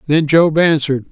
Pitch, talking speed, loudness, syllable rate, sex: 150 Hz, 160 wpm, -13 LUFS, 5.6 syllables/s, male